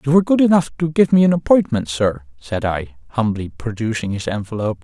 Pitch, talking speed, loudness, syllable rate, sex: 130 Hz, 200 wpm, -18 LUFS, 6.1 syllables/s, male